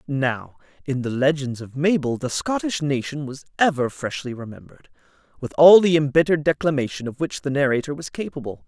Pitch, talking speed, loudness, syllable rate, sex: 145 Hz, 165 wpm, -21 LUFS, 5.6 syllables/s, male